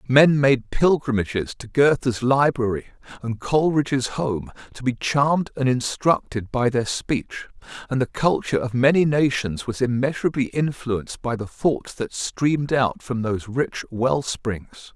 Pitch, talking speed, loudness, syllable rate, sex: 130 Hz, 150 wpm, -22 LUFS, 4.6 syllables/s, male